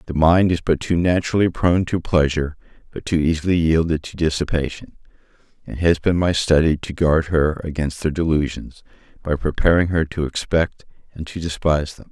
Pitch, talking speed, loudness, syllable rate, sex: 80 Hz, 175 wpm, -19 LUFS, 5.5 syllables/s, male